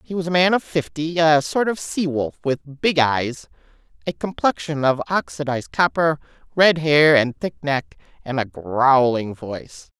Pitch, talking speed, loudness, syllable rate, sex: 150 Hz, 170 wpm, -20 LUFS, 4.4 syllables/s, female